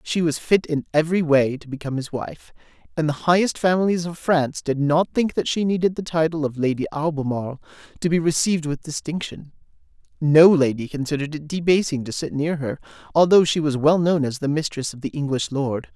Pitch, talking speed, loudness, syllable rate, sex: 155 Hz, 200 wpm, -21 LUFS, 5.8 syllables/s, male